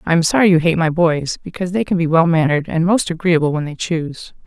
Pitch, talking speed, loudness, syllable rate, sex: 165 Hz, 255 wpm, -16 LUFS, 6.4 syllables/s, female